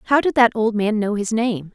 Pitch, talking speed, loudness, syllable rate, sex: 220 Hz, 275 wpm, -19 LUFS, 5.3 syllables/s, female